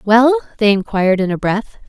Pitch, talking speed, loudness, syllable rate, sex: 220 Hz, 190 wpm, -15 LUFS, 5.2 syllables/s, female